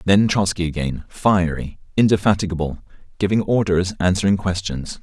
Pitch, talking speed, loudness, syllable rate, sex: 90 Hz, 110 wpm, -20 LUFS, 5.1 syllables/s, male